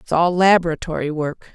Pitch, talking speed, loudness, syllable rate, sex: 165 Hz, 155 wpm, -18 LUFS, 5.6 syllables/s, female